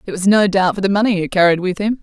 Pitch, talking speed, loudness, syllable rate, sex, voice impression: 195 Hz, 325 wpm, -15 LUFS, 6.8 syllables/s, female, feminine, adult-like, slightly soft, calm, slightly sweet